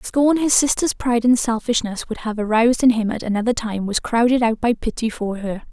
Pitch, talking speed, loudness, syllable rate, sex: 230 Hz, 230 wpm, -19 LUFS, 5.7 syllables/s, female